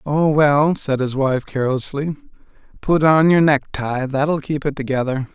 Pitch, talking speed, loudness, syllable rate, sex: 145 Hz, 145 wpm, -18 LUFS, 4.4 syllables/s, male